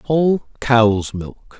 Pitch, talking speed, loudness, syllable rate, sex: 125 Hz, 115 wpm, -17 LUFS, 2.8 syllables/s, male